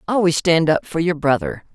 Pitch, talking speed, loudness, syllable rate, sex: 160 Hz, 205 wpm, -18 LUFS, 5.3 syllables/s, female